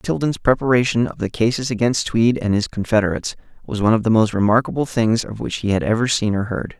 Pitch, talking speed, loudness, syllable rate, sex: 115 Hz, 220 wpm, -19 LUFS, 6.2 syllables/s, male